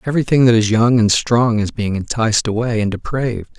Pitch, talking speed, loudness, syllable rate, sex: 115 Hz, 200 wpm, -16 LUFS, 5.9 syllables/s, male